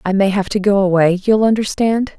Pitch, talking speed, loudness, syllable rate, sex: 200 Hz, 190 wpm, -15 LUFS, 5.4 syllables/s, female